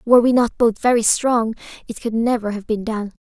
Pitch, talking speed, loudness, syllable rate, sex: 230 Hz, 225 wpm, -18 LUFS, 5.5 syllables/s, female